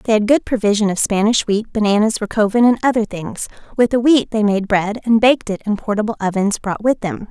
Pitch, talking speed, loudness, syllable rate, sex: 215 Hz, 220 wpm, -16 LUFS, 5.8 syllables/s, female